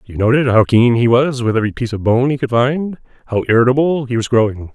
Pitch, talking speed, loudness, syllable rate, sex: 125 Hz, 240 wpm, -15 LUFS, 6.3 syllables/s, male